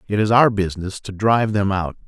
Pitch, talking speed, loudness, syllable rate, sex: 100 Hz, 230 wpm, -19 LUFS, 6.0 syllables/s, male